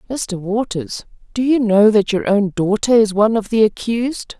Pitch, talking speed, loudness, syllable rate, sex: 215 Hz, 190 wpm, -16 LUFS, 4.9 syllables/s, female